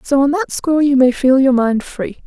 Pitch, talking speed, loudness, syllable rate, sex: 270 Hz, 265 wpm, -14 LUFS, 5.2 syllables/s, female